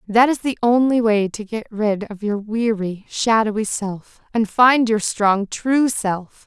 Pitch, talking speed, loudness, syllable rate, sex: 220 Hz, 175 wpm, -19 LUFS, 3.8 syllables/s, female